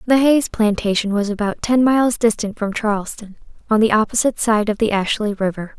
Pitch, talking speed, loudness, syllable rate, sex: 220 Hz, 185 wpm, -18 LUFS, 5.6 syllables/s, female